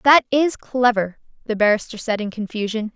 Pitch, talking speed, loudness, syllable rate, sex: 225 Hz, 165 wpm, -20 LUFS, 5.2 syllables/s, female